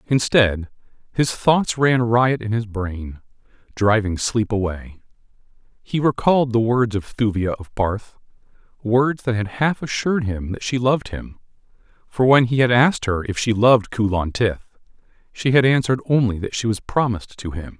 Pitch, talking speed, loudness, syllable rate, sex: 115 Hz, 170 wpm, -19 LUFS, 4.8 syllables/s, male